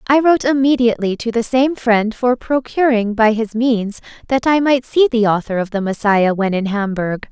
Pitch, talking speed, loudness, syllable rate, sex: 230 Hz, 195 wpm, -16 LUFS, 5.0 syllables/s, female